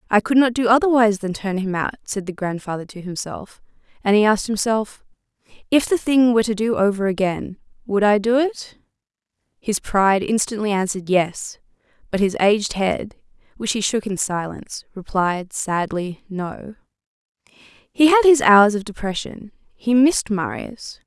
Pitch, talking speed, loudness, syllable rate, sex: 210 Hz, 160 wpm, -19 LUFS, 4.9 syllables/s, female